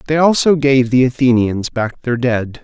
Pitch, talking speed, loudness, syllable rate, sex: 130 Hz, 180 wpm, -14 LUFS, 4.6 syllables/s, male